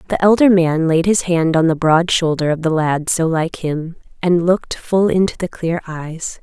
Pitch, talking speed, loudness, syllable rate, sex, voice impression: 170 Hz, 215 wpm, -16 LUFS, 4.6 syllables/s, female, feminine, slightly gender-neutral, slightly young, slightly adult-like, slightly thin, slightly relaxed, slightly weak, slightly bright, very soft, slightly clear, fluent, cute, intellectual, refreshing, very calm, friendly, reassuring, unique, elegant, sweet, slightly lively, very kind, slightly modest